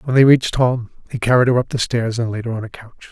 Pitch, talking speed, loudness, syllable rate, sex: 120 Hz, 310 wpm, -17 LUFS, 6.4 syllables/s, male